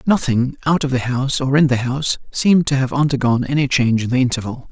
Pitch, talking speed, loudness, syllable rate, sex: 135 Hz, 230 wpm, -17 LUFS, 6.7 syllables/s, male